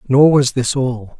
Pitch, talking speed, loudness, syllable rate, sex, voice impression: 130 Hz, 200 wpm, -15 LUFS, 3.9 syllables/s, male, very masculine, slightly old, very thick, slightly tensed, slightly weak, dark, soft, slightly muffled, slightly halting, slightly raspy, cool, intellectual, very sincere, very calm, very mature, friendly, very reassuring, very unique, elegant, very wild, sweet, kind, very modest